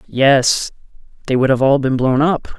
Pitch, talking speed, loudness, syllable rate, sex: 135 Hz, 185 wpm, -15 LUFS, 4.3 syllables/s, male